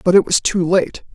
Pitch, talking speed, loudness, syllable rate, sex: 180 Hz, 260 wpm, -16 LUFS, 5.1 syllables/s, female